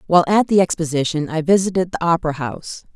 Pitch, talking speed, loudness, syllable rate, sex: 170 Hz, 185 wpm, -18 LUFS, 6.8 syllables/s, female